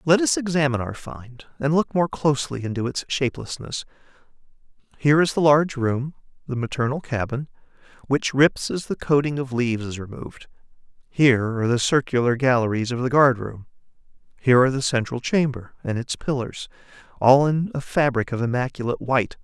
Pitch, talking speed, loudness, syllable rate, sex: 130 Hz, 165 wpm, -22 LUFS, 5.8 syllables/s, male